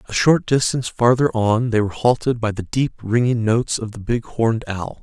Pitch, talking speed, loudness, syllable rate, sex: 115 Hz, 215 wpm, -19 LUFS, 5.4 syllables/s, male